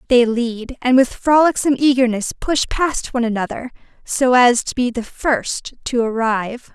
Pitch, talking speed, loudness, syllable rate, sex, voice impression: 245 Hz, 160 wpm, -17 LUFS, 4.7 syllables/s, female, feminine, adult-like, slightly powerful, slightly clear, slightly cute, slightly unique, slightly intense